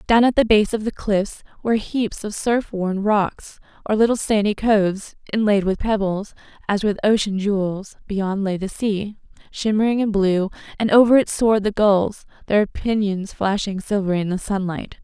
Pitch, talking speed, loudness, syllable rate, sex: 205 Hz, 175 wpm, -20 LUFS, 4.7 syllables/s, female